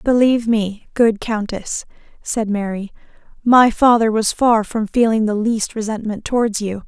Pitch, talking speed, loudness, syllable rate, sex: 220 Hz, 150 wpm, -17 LUFS, 4.5 syllables/s, female